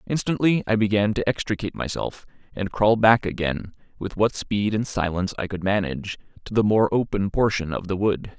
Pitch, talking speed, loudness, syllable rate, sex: 105 Hz, 185 wpm, -23 LUFS, 5.4 syllables/s, male